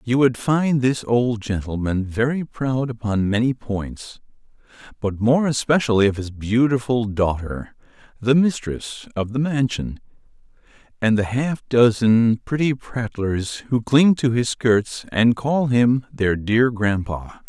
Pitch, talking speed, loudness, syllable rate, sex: 120 Hz, 130 wpm, -20 LUFS, 3.9 syllables/s, male